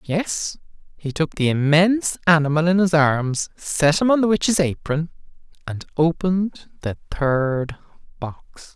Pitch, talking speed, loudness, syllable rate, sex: 160 Hz, 135 wpm, -20 LUFS, 4.0 syllables/s, male